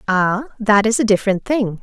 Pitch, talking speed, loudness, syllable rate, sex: 215 Hz, 195 wpm, -17 LUFS, 5.1 syllables/s, female